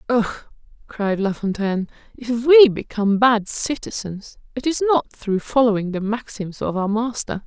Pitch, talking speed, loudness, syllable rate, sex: 225 Hz, 155 wpm, -20 LUFS, 4.6 syllables/s, female